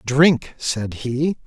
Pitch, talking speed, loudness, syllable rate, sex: 135 Hz, 125 wpm, -20 LUFS, 2.4 syllables/s, male